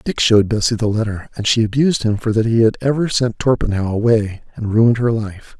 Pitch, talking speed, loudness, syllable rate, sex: 110 Hz, 225 wpm, -17 LUFS, 5.9 syllables/s, male